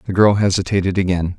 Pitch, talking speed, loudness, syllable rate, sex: 95 Hz, 175 wpm, -17 LUFS, 6.5 syllables/s, male